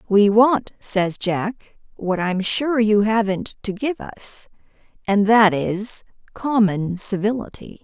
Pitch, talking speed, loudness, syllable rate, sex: 210 Hz, 125 wpm, -20 LUFS, 3.4 syllables/s, female